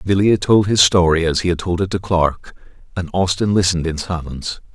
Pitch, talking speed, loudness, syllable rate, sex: 90 Hz, 200 wpm, -17 LUFS, 5.8 syllables/s, male